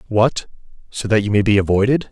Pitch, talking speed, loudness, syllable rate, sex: 110 Hz, 200 wpm, -17 LUFS, 6.0 syllables/s, male